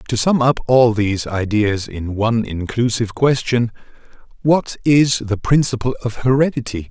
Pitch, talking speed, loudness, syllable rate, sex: 115 Hz, 140 wpm, -17 LUFS, 4.8 syllables/s, male